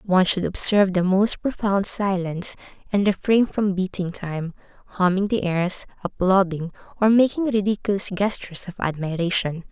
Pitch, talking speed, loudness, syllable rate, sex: 190 Hz, 135 wpm, -22 LUFS, 5.1 syllables/s, female